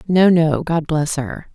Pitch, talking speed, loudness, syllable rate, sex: 160 Hz, 195 wpm, -17 LUFS, 3.7 syllables/s, female